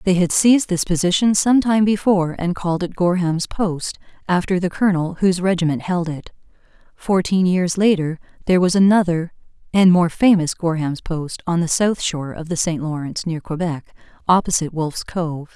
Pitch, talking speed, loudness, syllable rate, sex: 175 Hz, 170 wpm, -19 LUFS, 5.3 syllables/s, female